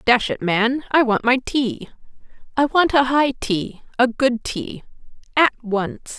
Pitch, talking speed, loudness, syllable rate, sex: 245 Hz, 155 wpm, -19 LUFS, 3.7 syllables/s, female